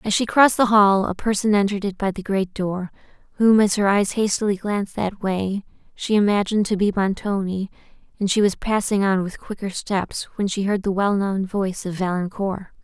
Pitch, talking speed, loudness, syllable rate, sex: 200 Hz, 195 wpm, -21 LUFS, 5.3 syllables/s, female